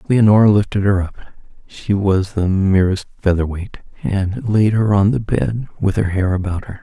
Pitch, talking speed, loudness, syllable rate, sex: 100 Hz, 160 wpm, -17 LUFS, 4.6 syllables/s, male